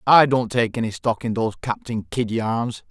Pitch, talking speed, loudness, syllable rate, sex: 115 Hz, 205 wpm, -22 LUFS, 4.9 syllables/s, male